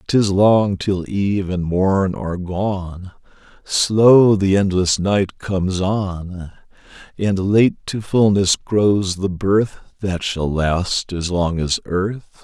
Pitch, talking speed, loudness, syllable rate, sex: 95 Hz, 135 wpm, -18 LUFS, 3.1 syllables/s, male